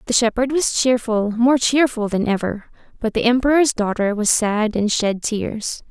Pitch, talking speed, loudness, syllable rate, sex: 230 Hz, 175 wpm, -18 LUFS, 4.4 syllables/s, female